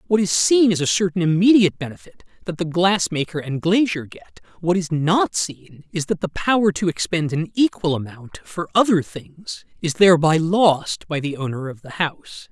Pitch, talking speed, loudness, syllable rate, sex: 170 Hz, 190 wpm, -19 LUFS, 4.9 syllables/s, male